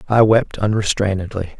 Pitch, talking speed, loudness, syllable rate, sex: 105 Hz, 115 wpm, -17 LUFS, 5.0 syllables/s, male